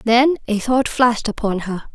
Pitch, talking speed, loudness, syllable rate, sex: 235 Hz, 185 wpm, -18 LUFS, 5.0 syllables/s, female